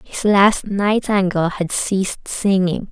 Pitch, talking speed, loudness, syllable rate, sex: 195 Hz, 125 wpm, -17 LUFS, 3.8 syllables/s, female